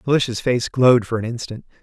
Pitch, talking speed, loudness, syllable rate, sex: 120 Hz, 195 wpm, -19 LUFS, 6.4 syllables/s, male